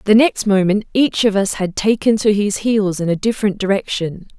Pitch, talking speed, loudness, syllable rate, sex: 205 Hz, 205 wpm, -16 LUFS, 5.1 syllables/s, female